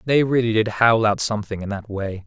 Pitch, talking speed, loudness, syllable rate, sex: 110 Hz, 240 wpm, -20 LUFS, 5.6 syllables/s, male